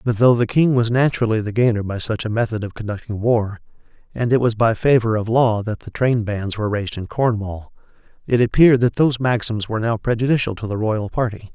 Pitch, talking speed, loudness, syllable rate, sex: 115 Hz, 220 wpm, -19 LUFS, 6.0 syllables/s, male